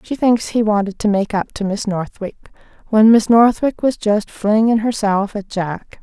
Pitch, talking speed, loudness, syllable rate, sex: 210 Hz, 190 wpm, -16 LUFS, 4.5 syllables/s, female